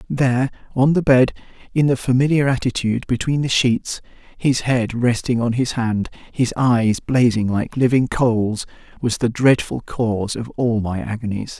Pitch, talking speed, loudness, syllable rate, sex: 120 Hz, 160 wpm, -19 LUFS, 4.7 syllables/s, male